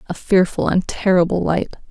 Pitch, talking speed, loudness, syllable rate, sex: 180 Hz, 155 wpm, -18 LUFS, 5.0 syllables/s, female